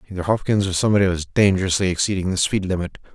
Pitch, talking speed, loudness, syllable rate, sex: 95 Hz, 190 wpm, -20 LUFS, 7.5 syllables/s, male